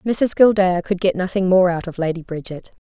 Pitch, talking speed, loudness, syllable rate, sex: 185 Hz, 210 wpm, -18 LUFS, 5.3 syllables/s, female